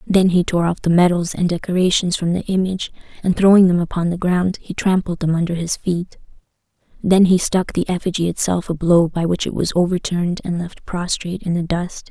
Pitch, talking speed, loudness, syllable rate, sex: 175 Hz, 210 wpm, -18 LUFS, 5.6 syllables/s, female